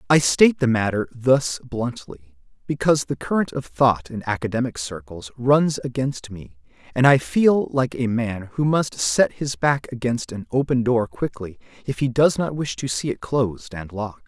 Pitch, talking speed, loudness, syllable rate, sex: 125 Hz, 185 wpm, -21 LUFS, 4.6 syllables/s, male